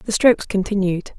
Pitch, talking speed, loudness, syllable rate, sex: 200 Hz, 150 wpm, -19 LUFS, 5.3 syllables/s, female